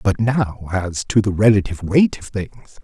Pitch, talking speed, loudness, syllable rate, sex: 100 Hz, 190 wpm, -18 LUFS, 4.5 syllables/s, male